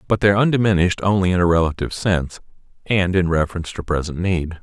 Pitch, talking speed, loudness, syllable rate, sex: 90 Hz, 195 wpm, -19 LUFS, 7.2 syllables/s, male